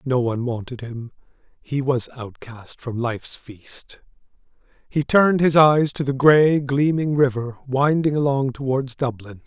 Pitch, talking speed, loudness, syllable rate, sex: 130 Hz, 145 wpm, -20 LUFS, 4.3 syllables/s, male